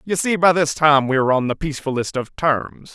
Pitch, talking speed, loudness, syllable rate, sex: 145 Hz, 245 wpm, -18 LUFS, 5.6 syllables/s, male